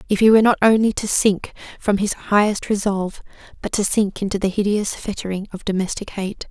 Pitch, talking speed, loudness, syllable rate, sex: 200 Hz, 195 wpm, -19 LUFS, 5.7 syllables/s, female